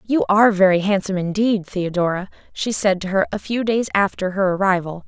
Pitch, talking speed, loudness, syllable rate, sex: 195 Hz, 190 wpm, -19 LUFS, 5.7 syllables/s, female